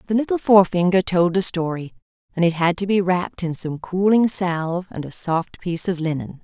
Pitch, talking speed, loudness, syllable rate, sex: 180 Hz, 205 wpm, -20 LUFS, 5.5 syllables/s, female